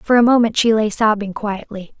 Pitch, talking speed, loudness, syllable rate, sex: 215 Hz, 210 wpm, -16 LUFS, 5.2 syllables/s, female